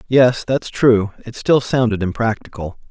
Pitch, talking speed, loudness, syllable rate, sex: 115 Hz, 145 wpm, -17 LUFS, 4.4 syllables/s, male